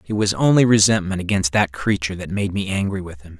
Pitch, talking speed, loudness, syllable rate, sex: 95 Hz, 230 wpm, -19 LUFS, 6.2 syllables/s, male